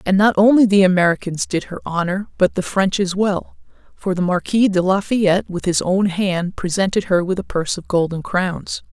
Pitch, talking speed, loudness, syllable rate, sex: 190 Hz, 200 wpm, -18 LUFS, 5.1 syllables/s, female